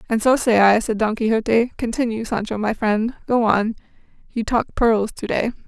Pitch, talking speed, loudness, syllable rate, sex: 225 Hz, 190 wpm, -20 LUFS, 5.0 syllables/s, female